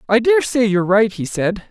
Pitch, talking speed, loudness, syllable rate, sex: 220 Hz, 210 wpm, -16 LUFS, 5.9 syllables/s, male